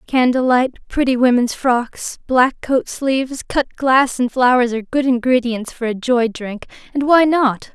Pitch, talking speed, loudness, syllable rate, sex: 250 Hz, 170 wpm, -17 LUFS, 4.2 syllables/s, female